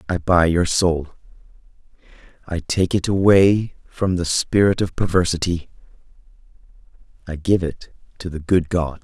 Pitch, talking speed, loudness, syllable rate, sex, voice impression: 90 Hz, 135 wpm, -19 LUFS, 4.4 syllables/s, male, very masculine, very adult-like, slightly thick, slightly tensed, slightly powerful, bright, soft, very clear, fluent, cool, intellectual, very refreshing, slightly sincere, calm, slightly mature, friendly, reassuring, slightly unique, slightly elegant, wild, slightly sweet, lively, kind, slightly intense